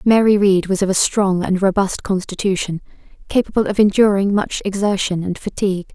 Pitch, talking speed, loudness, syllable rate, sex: 195 Hz, 160 wpm, -17 LUFS, 5.4 syllables/s, female